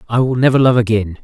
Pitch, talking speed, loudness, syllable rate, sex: 120 Hz, 245 wpm, -14 LUFS, 6.8 syllables/s, male